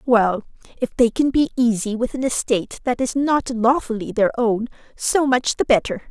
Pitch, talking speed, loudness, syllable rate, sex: 240 Hz, 185 wpm, -20 LUFS, 4.8 syllables/s, female